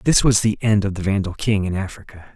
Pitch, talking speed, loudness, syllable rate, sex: 100 Hz, 255 wpm, -19 LUFS, 5.9 syllables/s, male